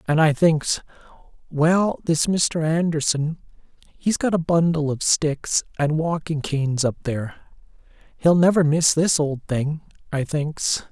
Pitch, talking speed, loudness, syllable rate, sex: 155 Hz, 130 wpm, -21 LUFS, 4.1 syllables/s, male